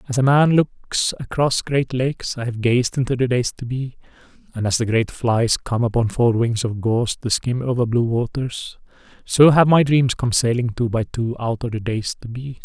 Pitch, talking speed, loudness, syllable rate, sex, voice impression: 120 Hz, 220 wpm, -19 LUFS, 4.8 syllables/s, male, very masculine, adult-like, slightly thick, slightly dark, slightly calm, slightly reassuring, slightly kind